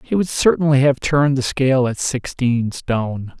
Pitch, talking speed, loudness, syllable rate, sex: 130 Hz, 175 wpm, -18 LUFS, 4.9 syllables/s, male